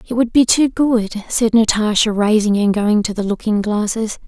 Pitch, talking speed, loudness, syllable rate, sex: 215 Hz, 195 wpm, -16 LUFS, 4.9 syllables/s, female